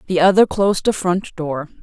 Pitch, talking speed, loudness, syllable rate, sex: 180 Hz, 195 wpm, -17 LUFS, 5.2 syllables/s, female